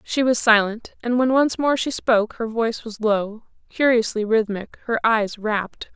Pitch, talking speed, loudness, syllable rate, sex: 225 Hz, 180 wpm, -21 LUFS, 4.4 syllables/s, female